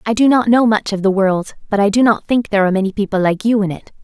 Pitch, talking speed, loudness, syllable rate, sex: 210 Hz, 310 wpm, -15 LUFS, 6.7 syllables/s, female